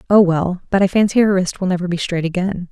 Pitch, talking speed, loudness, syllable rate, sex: 185 Hz, 265 wpm, -17 LUFS, 6.2 syllables/s, female